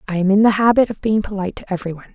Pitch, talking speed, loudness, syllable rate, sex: 200 Hz, 305 wpm, -17 LUFS, 8.9 syllables/s, female